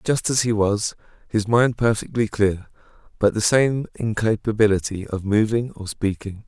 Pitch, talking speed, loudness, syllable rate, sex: 105 Hz, 150 wpm, -21 LUFS, 4.6 syllables/s, male